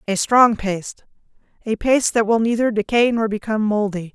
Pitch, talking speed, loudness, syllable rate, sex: 215 Hz, 160 wpm, -18 LUFS, 5.6 syllables/s, female